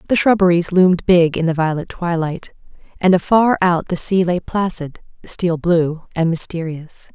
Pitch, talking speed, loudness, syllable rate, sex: 175 Hz, 160 wpm, -17 LUFS, 4.6 syllables/s, female